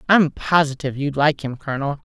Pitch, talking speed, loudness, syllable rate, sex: 145 Hz, 175 wpm, -20 LUFS, 6.0 syllables/s, female